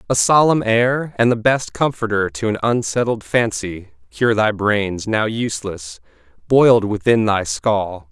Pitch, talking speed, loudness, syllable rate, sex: 110 Hz, 150 wpm, -17 LUFS, 4.2 syllables/s, male